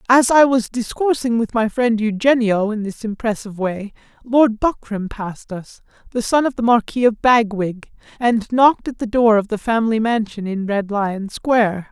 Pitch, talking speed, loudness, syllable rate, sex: 225 Hz, 180 wpm, -18 LUFS, 4.8 syllables/s, male